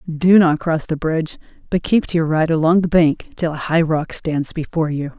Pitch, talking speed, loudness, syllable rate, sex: 160 Hz, 230 wpm, -18 LUFS, 5.2 syllables/s, female